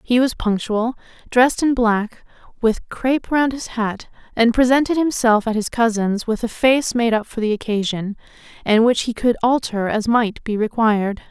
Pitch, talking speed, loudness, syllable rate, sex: 230 Hz, 180 wpm, -19 LUFS, 4.9 syllables/s, female